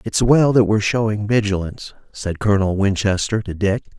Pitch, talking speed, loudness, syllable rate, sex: 105 Hz, 165 wpm, -18 LUFS, 5.5 syllables/s, male